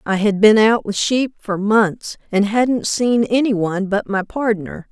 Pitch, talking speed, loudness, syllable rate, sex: 215 Hz, 195 wpm, -17 LUFS, 4.1 syllables/s, female